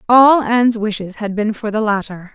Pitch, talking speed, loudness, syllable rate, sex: 220 Hz, 205 wpm, -16 LUFS, 5.1 syllables/s, female